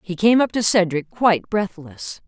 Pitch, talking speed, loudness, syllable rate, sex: 195 Hz, 185 wpm, -19 LUFS, 4.7 syllables/s, female